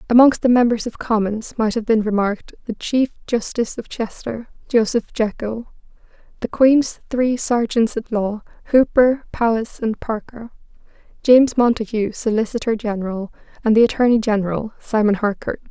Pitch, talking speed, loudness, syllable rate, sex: 225 Hz, 135 wpm, -19 LUFS, 5.0 syllables/s, female